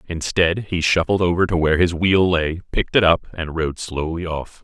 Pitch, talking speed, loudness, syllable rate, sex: 85 Hz, 205 wpm, -19 LUFS, 5.1 syllables/s, male